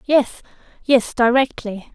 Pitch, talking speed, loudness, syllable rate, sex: 245 Hz, 90 wpm, -18 LUFS, 3.7 syllables/s, female